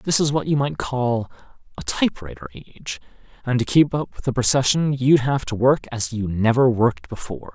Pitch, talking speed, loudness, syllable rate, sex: 125 Hz, 205 wpm, -20 LUFS, 5.4 syllables/s, male